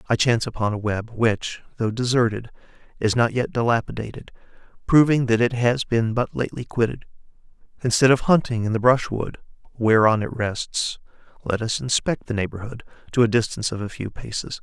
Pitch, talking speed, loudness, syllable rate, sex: 115 Hz, 170 wpm, -22 LUFS, 5.5 syllables/s, male